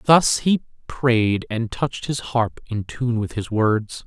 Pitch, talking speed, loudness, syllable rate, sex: 120 Hz, 175 wpm, -21 LUFS, 3.5 syllables/s, male